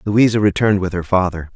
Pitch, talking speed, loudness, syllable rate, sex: 100 Hz, 195 wpm, -16 LUFS, 6.2 syllables/s, male